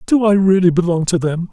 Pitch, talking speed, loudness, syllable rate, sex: 180 Hz, 235 wpm, -14 LUFS, 5.8 syllables/s, male